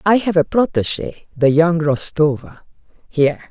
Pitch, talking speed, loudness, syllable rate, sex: 160 Hz, 135 wpm, -17 LUFS, 4.5 syllables/s, female